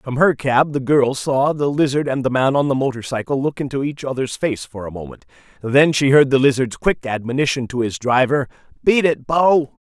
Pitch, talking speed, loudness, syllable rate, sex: 135 Hz, 215 wpm, -18 LUFS, 5.2 syllables/s, male